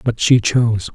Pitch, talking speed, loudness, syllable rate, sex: 115 Hz, 190 wpm, -15 LUFS, 4.8 syllables/s, male